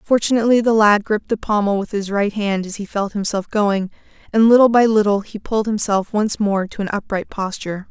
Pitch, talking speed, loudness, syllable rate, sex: 210 Hz, 215 wpm, -18 LUFS, 5.7 syllables/s, female